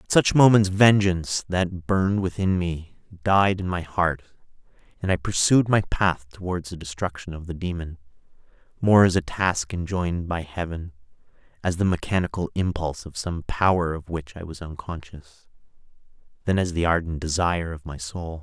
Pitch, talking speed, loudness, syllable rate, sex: 90 Hz, 165 wpm, -23 LUFS, 5.0 syllables/s, male